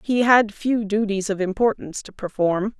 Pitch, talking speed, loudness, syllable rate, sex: 210 Hz, 170 wpm, -21 LUFS, 4.8 syllables/s, female